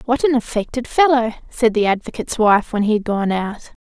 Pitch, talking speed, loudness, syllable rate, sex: 230 Hz, 205 wpm, -18 LUFS, 5.5 syllables/s, female